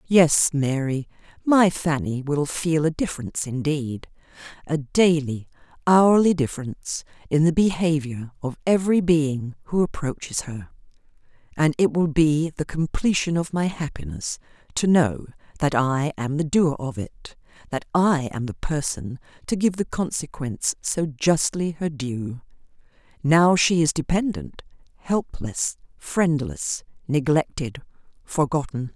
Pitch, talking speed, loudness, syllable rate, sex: 150 Hz, 125 wpm, -23 LUFS, 4.3 syllables/s, female